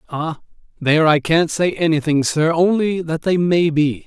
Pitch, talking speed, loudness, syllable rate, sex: 160 Hz, 175 wpm, -17 LUFS, 4.7 syllables/s, male